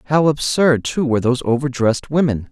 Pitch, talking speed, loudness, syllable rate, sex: 135 Hz, 165 wpm, -17 LUFS, 6.1 syllables/s, male